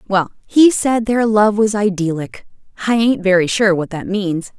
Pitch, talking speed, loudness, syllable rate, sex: 200 Hz, 185 wpm, -16 LUFS, 4.5 syllables/s, female